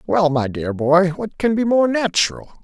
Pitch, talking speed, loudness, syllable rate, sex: 175 Hz, 205 wpm, -18 LUFS, 4.4 syllables/s, male